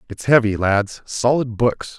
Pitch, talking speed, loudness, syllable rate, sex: 115 Hz, 120 wpm, -18 LUFS, 4.0 syllables/s, male